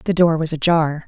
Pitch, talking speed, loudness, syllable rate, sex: 160 Hz, 225 wpm, -17 LUFS, 5.4 syllables/s, female